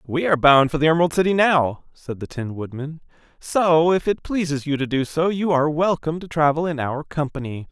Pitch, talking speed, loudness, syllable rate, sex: 155 Hz, 220 wpm, -20 LUFS, 5.6 syllables/s, male